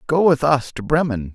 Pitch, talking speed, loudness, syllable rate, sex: 140 Hz, 225 wpm, -18 LUFS, 5.1 syllables/s, male